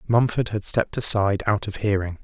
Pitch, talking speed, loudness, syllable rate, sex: 105 Hz, 190 wpm, -22 LUFS, 5.9 syllables/s, male